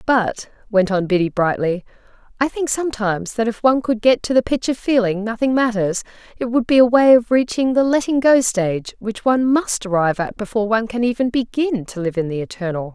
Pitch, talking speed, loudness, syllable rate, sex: 225 Hz, 215 wpm, -18 LUFS, 5.8 syllables/s, female